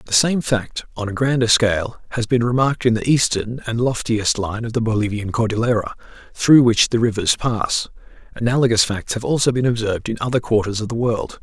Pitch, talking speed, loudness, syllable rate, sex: 115 Hz, 195 wpm, -19 LUFS, 5.5 syllables/s, male